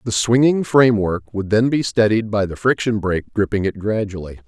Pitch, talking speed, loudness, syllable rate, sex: 110 Hz, 190 wpm, -18 LUFS, 5.5 syllables/s, male